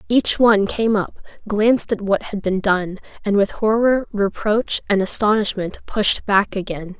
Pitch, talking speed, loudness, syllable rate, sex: 205 Hz, 165 wpm, -19 LUFS, 4.4 syllables/s, female